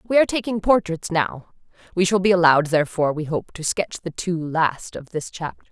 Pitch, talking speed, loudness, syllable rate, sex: 170 Hz, 210 wpm, -21 LUFS, 5.8 syllables/s, female